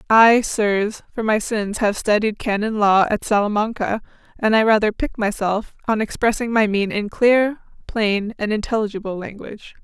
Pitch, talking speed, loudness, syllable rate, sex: 215 Hz, 160 wpm, -19 LUFS, 5.0 syllables/s, female